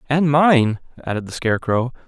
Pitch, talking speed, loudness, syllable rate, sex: 130 Hz, 145 wpm, -18 LUFS, 5.2 syllables/s, male